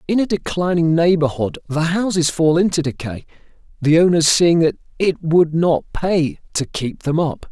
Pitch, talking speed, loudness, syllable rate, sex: 165 Hz, 170 wpm, -17 LUFS, 4.6 syllables/s, male